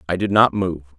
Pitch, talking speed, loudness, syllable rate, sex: 90 Hz, 245 wpm, -18 LUFS, 6.2 syllables/s, male